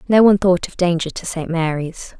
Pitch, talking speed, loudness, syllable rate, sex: 175 Hz, 220 wpm, -18 LUFS, 5.5 syllables/s, female